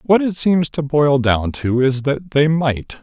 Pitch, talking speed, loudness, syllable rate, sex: 145 Hz, 220 wpm, -17 LUFS, 3.8 syllables/s, male